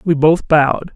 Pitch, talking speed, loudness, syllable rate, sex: 155 Hz, 190 wpm, -14 LUFS, 4.8 syllables/s, male